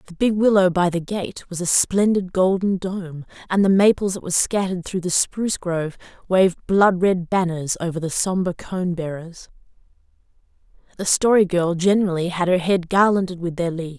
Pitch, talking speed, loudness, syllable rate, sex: 180 Hz, 175 wpm, -20 LUFS, 5.3 syllables/s, female